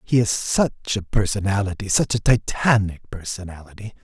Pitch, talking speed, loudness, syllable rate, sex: 105 Hz, 135 wpm, -21 LUFS, 5.3 syllables/s, male